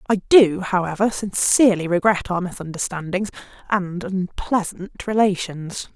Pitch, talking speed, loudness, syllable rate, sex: 190 Hz, 100 wpm, -20 LUFS, 4.5 syllables/s, female